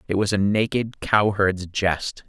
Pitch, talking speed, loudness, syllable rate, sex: 100 Hz, 185 wpm, -22 LUFS, 3.9 syllables/s, male